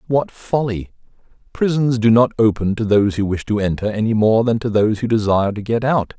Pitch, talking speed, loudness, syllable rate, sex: 110 Hz, 215 wpm, -17 LUFS, 5.8 syllables/s, male